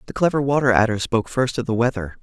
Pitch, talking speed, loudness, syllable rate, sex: 120 Hz, 245 wpm, -20 LUFS, 6.9 syllables/s, male